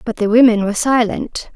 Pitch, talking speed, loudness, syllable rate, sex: 225 Hz, 195 wpm, -14 LUFS, 5.5 syllables/s, female